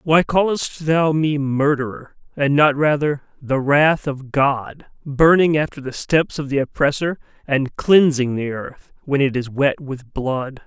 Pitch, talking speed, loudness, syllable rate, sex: 145 Hz, 165 wpm, -19 LUFS, 4.0 syllables/s, male